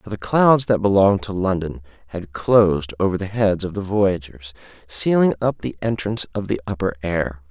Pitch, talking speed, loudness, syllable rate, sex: 95 Hz, 185 wpm, -20 LUFS, 5.1 syllables/s, male